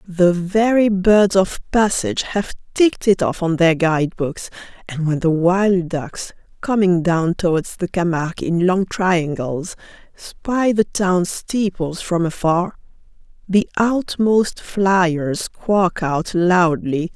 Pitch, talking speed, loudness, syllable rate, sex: 180 Hz, 135 wpm, -18 LUFS, 3.6 syllables/s, female